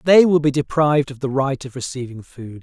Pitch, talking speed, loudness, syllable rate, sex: 140 Hz, 230 wpm, -19 LUFS, 5.6 syllables/s, male